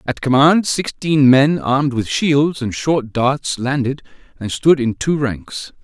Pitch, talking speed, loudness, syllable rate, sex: 135 Hz, 165 wpm, -16 LUFS, 3.8 syllables/s, male